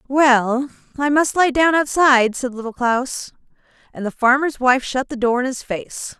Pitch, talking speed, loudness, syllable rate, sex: 260 Hz, 185 wpm, -18 LUFS, 4.4 syllables/s, female